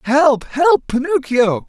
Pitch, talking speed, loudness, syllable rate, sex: 235 Hz, 105 wpm, -15 LUFS, 3.4 syllables/s, male